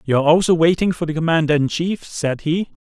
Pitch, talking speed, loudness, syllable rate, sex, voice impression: 160 Hz, 210 wpm, -18 LUFS, 5.7 syllables/s, male, very masculine, very adult-like, old, very thick, slightly tensed, slightly weak, slightly dark, hard, muffled, slightly halting, raspy, cool, intellectual, very sincere, very calm, very mature, very friendly, reassuring, unique, very wild, slightly lively, kind, slightly intense